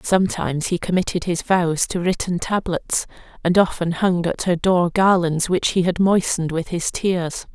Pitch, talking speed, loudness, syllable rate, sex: 175 Hz, 175 wpm, -20 LUFS, 4.7 syllables/s, female